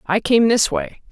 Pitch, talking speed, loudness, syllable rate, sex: 220 Hz, 215 wpm, -17 LUFS, 4.3 syllables/s, female